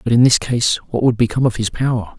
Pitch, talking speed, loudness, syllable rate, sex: 120 Hz, 275 wpm, -16 LUFS, 6.1 syllables/s, male